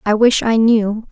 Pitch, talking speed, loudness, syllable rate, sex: 220 Hz, 215 wpm, -14 LUFS, 4.0 syllables/s, female